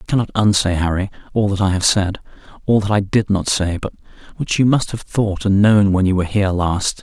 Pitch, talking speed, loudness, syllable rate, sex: 100 Hz, 230 wpm, -17 LUFS, 5.8 syllables/s, male